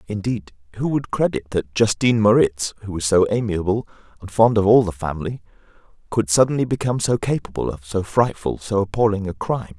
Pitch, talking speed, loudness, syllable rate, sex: 105 Hz, 180 wpm, -20 LUFS, 5.9 syllables/s, male